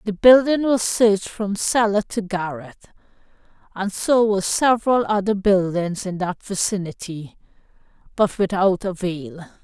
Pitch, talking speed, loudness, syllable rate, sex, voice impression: 200 Hz, 125 wpm, -20 LUFS, 4.5 syllables/s, female, very feminine, slightly old, thin, tensed, powerful, bright, very hard, very clear, halting, cool, intellectual, refreshing, very sincere, slightly calm, slightly friendly, slightly reassuring, slightly unique, elegant, slightly wild, slightly sweet, slightly lively, strict, sharp, slightly light